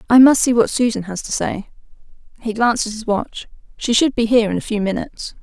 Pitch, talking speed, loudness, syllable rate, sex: 225 Hz, 230 wpm, -17 LUFS, 6.2 syllables/s, female